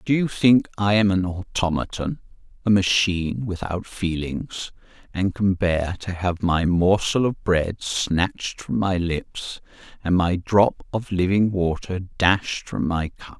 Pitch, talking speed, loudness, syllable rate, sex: 95 Hz, 150 wpm, -22 LUFS, 3.8 syllables/s, male